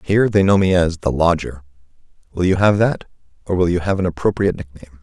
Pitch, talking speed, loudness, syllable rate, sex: 90 Hz, 225 wpm, -17 LUFS, 6.2 syllables/s, male